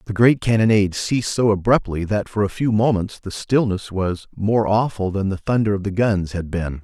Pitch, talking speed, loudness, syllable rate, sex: 105 Hz, 210 wpm, -20 LUFS, 5.1 syllables/s, male